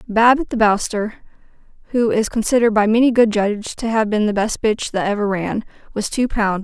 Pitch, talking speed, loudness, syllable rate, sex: 220 Hz, 210 wpm, -18 LUFS, 5.6 syllables/s, female